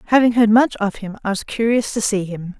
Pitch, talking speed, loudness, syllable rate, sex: 215 Hz, 255 wpm, -18 LUFS, 5.7 syllables/s, female